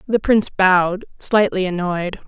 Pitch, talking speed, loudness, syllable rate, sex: 190 Hz, 130 wpm, -18 LUFS, 4.6 syllables/s, female